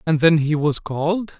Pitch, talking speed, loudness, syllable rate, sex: 160 Hz, 215 wpm, -19 LUFS, 4.7 syllables/s, male